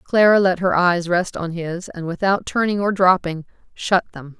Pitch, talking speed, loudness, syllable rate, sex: 180 Hz, 190 wpm, -19 LUFS, 4.6 syllables/s, female